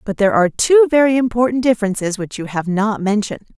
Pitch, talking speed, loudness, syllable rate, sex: 220 Hz, 200 wpm, -16 LUFS, 6.5 syllables/s, female